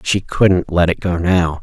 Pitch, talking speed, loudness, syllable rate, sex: 90 Hz, 220 wpm, -16 LUFS, 3.9 syllables/s, male